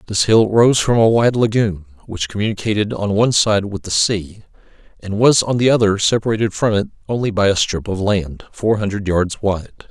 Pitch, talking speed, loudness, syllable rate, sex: 105 Hz, 200 wpm, -17 LUFS, 5.3 syllables/s, male